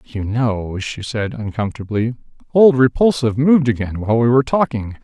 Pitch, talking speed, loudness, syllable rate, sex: 120 Hz, 155 wpm, -17 LUFS, 5.6 syllables/s, male